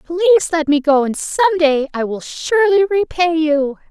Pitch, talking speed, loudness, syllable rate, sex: 325 Hz, 185 wpm, -15 LUFS, 4.6 syllables/s, female